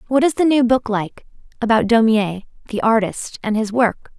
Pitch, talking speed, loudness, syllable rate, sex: 230 Hz, 185 wpm, -18 LUFS, 4.8 syllables/s, female